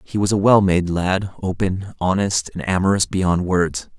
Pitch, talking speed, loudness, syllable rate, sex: 95 Hz, 180 wpm, -19 LUFS, 4.5 syllables/s, male